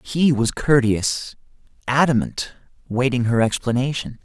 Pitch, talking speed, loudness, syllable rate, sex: 125 Hz, 100 wpm, -20 LUFS, 4.3 syllables/s, male